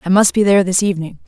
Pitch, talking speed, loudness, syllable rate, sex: 190 Hz, 285 wpm, -14 LUFS, 8.0 syllables/s, female